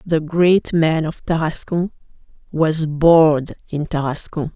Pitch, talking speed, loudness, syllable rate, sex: 160 Hz, 120 wpm, -18 LUFS, 3.8 syllables/s, female